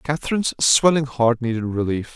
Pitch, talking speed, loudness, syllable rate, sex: 130 Hz, 140 wpm, -19 LUFS, 5.5 syllables/s, male